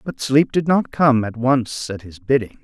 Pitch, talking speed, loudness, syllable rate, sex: 125 Hz, 230 wpm, -18 LUFS, 4.4 syllables/s, male